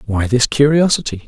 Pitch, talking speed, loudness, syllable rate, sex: 125 Hz, 140 wpm, -14 LUFS, 5.3 syllables/s, male